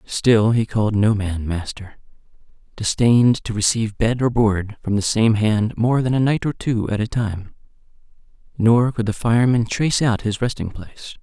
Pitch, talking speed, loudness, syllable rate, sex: 110 Hz, 180 wpm, -19 LUFS, 4.9 syllables/s, male